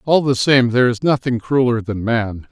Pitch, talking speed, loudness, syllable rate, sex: 125 Hz, 215 wpm, -17 LUFS, 5.0 syllables/s, male